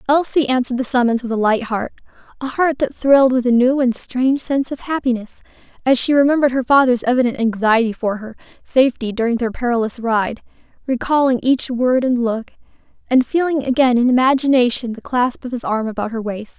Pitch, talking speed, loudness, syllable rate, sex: 250 Hz, 185 wpm, -17 LUFS, 5.9 syllables/s, female